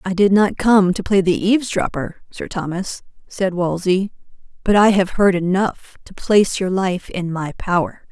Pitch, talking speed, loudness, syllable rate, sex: 190 Hz, 180 wpm, -18 LUFS, 4.5 syllables/s, female